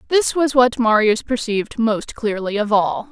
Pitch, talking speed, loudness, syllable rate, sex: 225 Hz, 175 wpm, -18 LUFS, 4.5 syllables/s, female